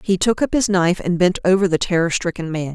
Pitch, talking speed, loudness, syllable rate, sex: 180 Hz, 265 wpm, -18 LUFS, 6.2 syllables/s, female